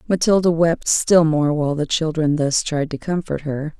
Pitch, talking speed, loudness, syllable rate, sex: 160 Hz, 190 wpm, -18 LUFS, 4.7 syllables/s, female